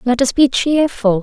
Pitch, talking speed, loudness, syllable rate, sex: 255 Hz, 195 wpm, -14 LUFS, 4.5 syllables/s, female